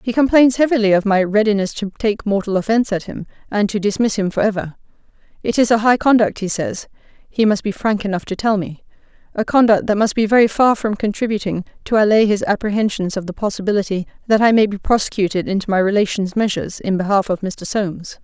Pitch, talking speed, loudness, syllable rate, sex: 210 Hz, 205 wpm, -17 LUFS, 6.1 syllables/s, female